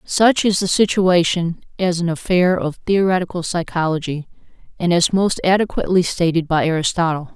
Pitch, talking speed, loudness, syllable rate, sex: 175 Hz, 140 wpm, -18 LUFS, 5.1 syllables/s, female